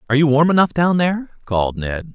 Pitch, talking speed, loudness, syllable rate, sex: 145 Hz, 225 wpm, -17 LUFS, 6.5 syllables/s, male